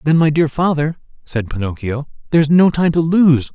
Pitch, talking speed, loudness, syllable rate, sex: 150 Hz, 205 wpm, -16 LUFS, 5.6 syllables/s, male